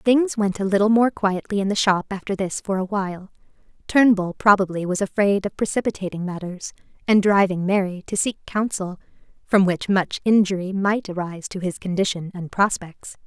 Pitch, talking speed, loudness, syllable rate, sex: 195 Hz, 165 wpm, -21 LUFS, 5.3 syllables/s, female